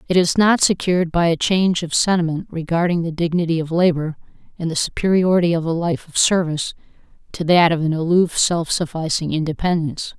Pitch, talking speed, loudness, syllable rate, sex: 170 Hz, 175 wpm, -18 LUFS, 5.9 syllables/s, female